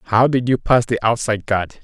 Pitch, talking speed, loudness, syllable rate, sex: 115 Hz, 230 wpm, -18 LUFS, 5.0 syllables/s, male